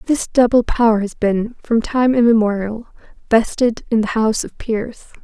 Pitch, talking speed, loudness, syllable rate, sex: 225 Hz, 160 wpm, -17 LUFS, 4.6 syllables/s, female